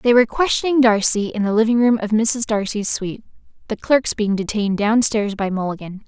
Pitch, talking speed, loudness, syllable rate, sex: 220 Hz, 190 wpm, -18 LUFS, 5.6 syllables/s, female